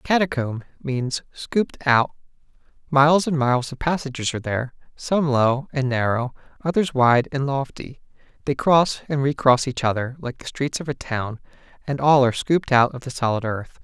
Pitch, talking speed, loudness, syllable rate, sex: 135 Hz, 180 wpm, -21 LUFS, 5.1 syllables/s, male